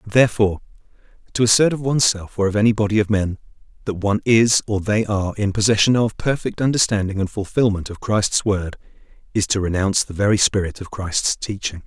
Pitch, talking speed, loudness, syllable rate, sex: 105 Hz, 190 wpm, -19 LUFS, 6.1 syllables/s, male